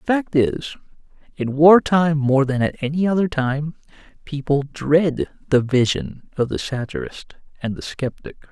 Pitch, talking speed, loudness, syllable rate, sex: 145 Hz, 155 wpm, -20 LUFS, 4.4 syllables/s, male